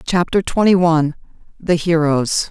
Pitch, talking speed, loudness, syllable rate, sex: 165 Hz, 95 wpm, -16 LUFS, 4.6 syllables/s, female